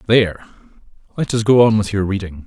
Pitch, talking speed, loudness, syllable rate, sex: 105 Hz, 195 wpm, -16 LUFS, 6.2 syllables/s, male